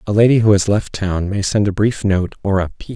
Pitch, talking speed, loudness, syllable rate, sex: 100 Hz, 285 wpm, -16 LUFS, 5.5 syllables/s, male